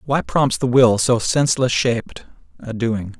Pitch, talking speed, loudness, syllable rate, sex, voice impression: 120 Hz, 170 wpm, -18 LUFS, 4.4 syllables/s, male, very masculine, adult-like, thick, slightly relaxed, slightly weak, slightly dark, soft, slightly muffled, fluent, slightly raspy, cool, very intellectual, slightly refreshing, very sincere, very calm, slightly mature, friendly, reassuring, slightly unique, elegant, slightly wild, sweet, kind, modest